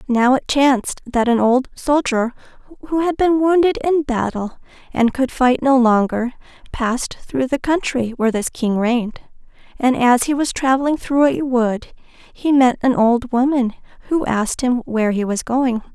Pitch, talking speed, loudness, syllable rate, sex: 255 Hz, 175 wpm, -18 LUFS, 4.5 syllables/s, female